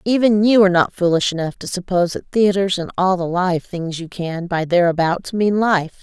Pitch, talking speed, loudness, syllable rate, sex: 185 Hz, 210 wpm, -18 LUFS, 5.1 syllables/s, female